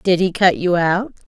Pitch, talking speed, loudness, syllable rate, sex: 180 Hz, 215 wpm, -17 LUFS, 4.3 syllables/s, female